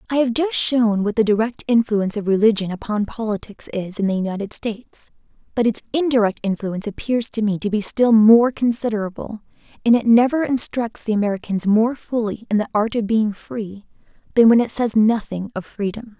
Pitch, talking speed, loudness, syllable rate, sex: 220 Hz, 185 wpm, -19 LUFS, 5.5 syllables/s, female